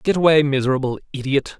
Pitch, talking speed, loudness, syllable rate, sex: 140 Hz, 150 wpm, -19 LUFS, 6.6 syllables/s, male